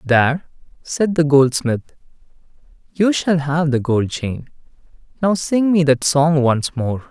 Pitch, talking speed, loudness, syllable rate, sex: 150 Hz, 135 wpm, -17 LUFS, 3.9 syllables/s, male